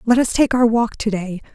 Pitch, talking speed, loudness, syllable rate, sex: 225 Hz, 270 wpm, -18 LUFS, 5.3 syllables/s, female